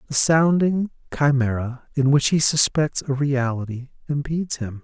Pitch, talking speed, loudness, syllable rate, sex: 140 Hz, 135 wpm, -21 LUFS, 4.9 syllables/s, male